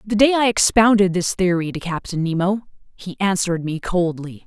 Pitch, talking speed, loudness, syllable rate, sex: 190 Hz, 175 wpm, -19 LUFS, 5.3 syllables/s, female